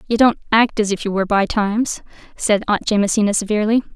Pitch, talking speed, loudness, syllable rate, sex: 210 Hz, 195 wpm, -18 LUFS, 6.5 syllables/s, female